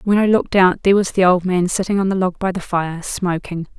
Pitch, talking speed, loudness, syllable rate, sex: 185 Hz, 270 wpm, -17 LUFS, 5.9 syllables/s, female